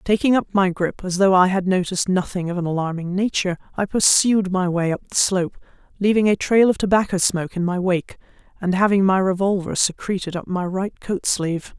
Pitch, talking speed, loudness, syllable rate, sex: 185 Hz, 205 wpm, -20 LUFS, 5.7 syllables/s, female